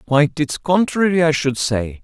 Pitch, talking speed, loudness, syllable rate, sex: 150 Hz, 175 wpm, -17 LUFS, 4.7 syllables/s, male